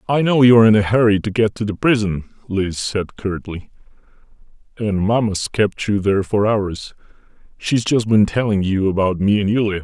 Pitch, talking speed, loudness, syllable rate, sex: 105 Hz, 190 wpm, -17 LUFS, 5.2 syllables/s, male